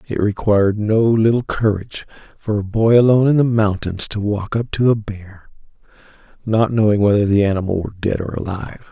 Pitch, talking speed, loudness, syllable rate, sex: 105 Hz, 180 wpm, -17 LUFS, 5.6 syllables/s, male